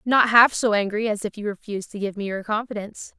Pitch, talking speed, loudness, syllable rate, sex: 210 Hz, 245 wpm, -22 LUFS, 6.2 syllables/s, female